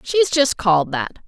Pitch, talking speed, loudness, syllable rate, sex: 220 Hz, 190 wpm, -18 LUFS, 4.5 syllables/s, female